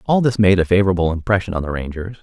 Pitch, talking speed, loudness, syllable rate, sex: 95 Hz, 245 wpm, -17 LUFS, 7.2 syllables/s, male